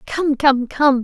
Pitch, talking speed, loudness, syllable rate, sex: 275 Hz, 175 wpm, -17 LUFS, 3.1 syllables/s, female